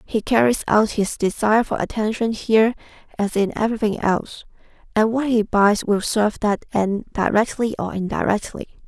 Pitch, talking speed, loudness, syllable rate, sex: 215 Hz, 155 wpm, -20 LUFS, 5.3 syllables/s, female